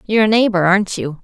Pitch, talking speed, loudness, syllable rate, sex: 195 Hz, 245 wpm, -15 LUFS, 7.4 syllables/s, female